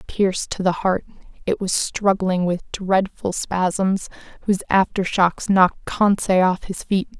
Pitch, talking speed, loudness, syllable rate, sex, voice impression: 190 Hz, 140 wpm, -20 LUFS, 4.1 syllables/s, female, feminine, adult-like, tensed, clear, slightly halting, intellectual, calm, friendly, kind, modest